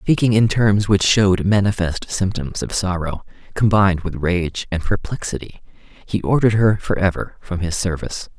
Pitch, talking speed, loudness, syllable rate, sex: 95 Hz, 155 wpm, -19 LUFS, 4.9 syllables/s, male